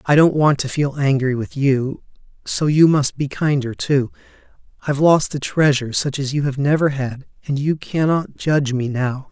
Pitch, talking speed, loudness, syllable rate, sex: 140 Hz, 195 wpm, -18 LUFS, 4.8 syllables/s, male